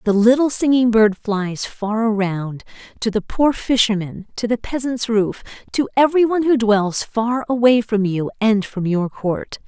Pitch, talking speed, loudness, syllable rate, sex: 225 Hz, 175 wpm, -18 LUFS, 4.4 syllables/s, female